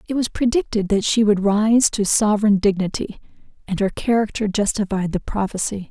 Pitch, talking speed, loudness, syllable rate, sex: 210 Hz, 160 wpm, -19 LUFS, 5.3 syllables/s, female